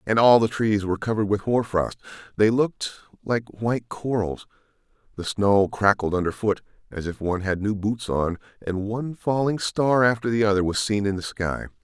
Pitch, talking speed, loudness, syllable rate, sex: 105 Hz, 195 wpm, -23 LUFS, 5.4 syllables/s, male